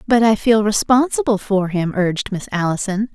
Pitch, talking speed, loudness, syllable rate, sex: 210 Hz, 170 wpm, -17 LUFS, 5.1 syllables/s, female